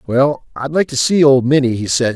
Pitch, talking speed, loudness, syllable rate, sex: 135 Hz, 280 wpm, -14 LUFS, 5.1 syllables/s, male